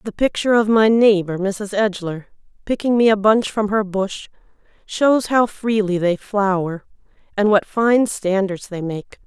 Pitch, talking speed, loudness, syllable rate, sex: 205 Hz, 160 wpm, -18 LUFS, 4.4 syllables/s, female